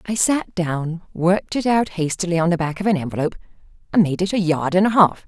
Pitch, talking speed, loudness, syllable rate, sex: 180 Hz, 240 wpm, -20 LUFS, 6.0 syllables/s, female